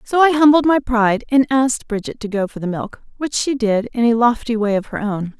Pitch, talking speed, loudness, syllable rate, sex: 235 Hz, 255 wpm, -17 LUFS, 5.6 syllables/s, female